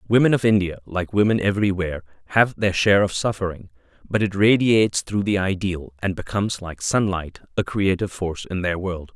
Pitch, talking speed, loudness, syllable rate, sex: 95 Hz, 175 wpm, -21 LUFS, 5.7 syllables/s, male